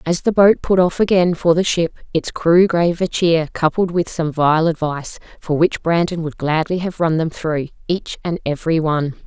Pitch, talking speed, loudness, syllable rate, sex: 165 Hz, 205 wpm, -17 LUFS, 5.1 syllables/s, female